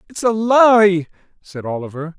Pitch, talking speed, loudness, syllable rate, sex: 190 Hz, 135 wpm, -15 LUFS, 4.2 syllables/s, male